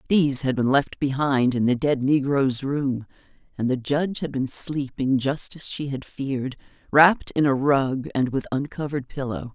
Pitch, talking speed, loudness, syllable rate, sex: 135 Hz, 180 wpm, -23 LUFS, 4.8 syllables/s, female